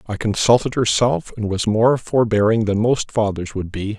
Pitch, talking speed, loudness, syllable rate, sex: 110 Hz, 180 wpm, -18 LUFS, 4.7 syllables/s, male